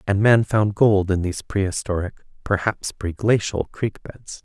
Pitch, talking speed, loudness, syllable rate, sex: 100 Hz, 150 wpm, -21 LUFS, 4.4 syllables/s, male